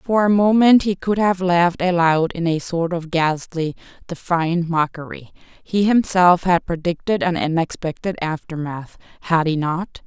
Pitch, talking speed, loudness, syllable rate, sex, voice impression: 175 Hz, 145 wpm, -19 LUFS, 4.4 syllables/s, female, very feminine, very adult-like, slightly middle-aged, slightly thin, tensed, slightly powerful, bright, hard, clear, fluent, slightly raspy, cool, intellectual, refreshing, sincere, calm, very friendly, very reassuring, slightly unique, slightly elegant, slightly wild, slightly sweet, slightly lively, strict, slightly intense